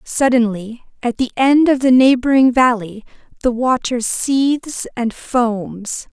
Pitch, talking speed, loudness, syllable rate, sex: 245 Hz, 125 wpm, -16 LUFS, 3.8 syllables/s, female